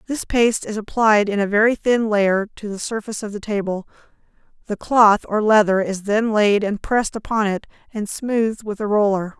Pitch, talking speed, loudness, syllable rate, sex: 210 Hz, 200 wpm, -19 LUFS, 5.2 syllables/s, female